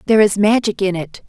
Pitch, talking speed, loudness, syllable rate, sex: 200 Hz, 235 wpm, -16 LUFS, 6.3 syllables/s, female